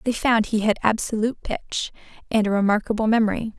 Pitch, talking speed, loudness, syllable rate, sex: 215 Hz, 170 wpm, -22 LUFS, 6.8 syllables/s, female